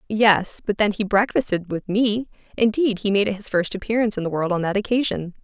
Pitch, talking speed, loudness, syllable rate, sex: 205 Hz, 200 wpm, -21 LUFS, 5.6 syllables/s, female